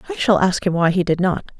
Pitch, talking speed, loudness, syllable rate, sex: 190 Hz, 300 wpm, -18 LUFS, 6.5 syllables/s, female